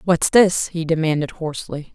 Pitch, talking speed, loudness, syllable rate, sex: 165 Hz, 155 wpm, -19 LUFS, 4.9 syllables/s, female